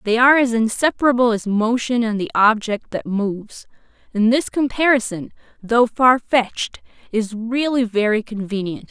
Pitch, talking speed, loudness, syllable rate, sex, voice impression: 230 Hz, 140 wpm, -18 LUFS, 4.8 syllables/s, female, feminine, adult-like, tensed, powerful, bright, soft, slightly muffled, intellectual, friendly, unique, lively